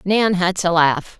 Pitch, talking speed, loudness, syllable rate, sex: 180 Hz, 200 wpm, -17 LUFS, 3.7 syllables/s, female